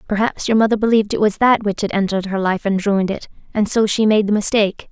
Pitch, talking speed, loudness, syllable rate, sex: 205 Hz, 255 wpm, -17 LUFS, 6.7 syllables/s, female